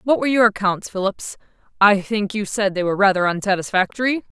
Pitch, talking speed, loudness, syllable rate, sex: 205 Hz, 180 wpm, -19 LUFS, 6.2 syllables/s, female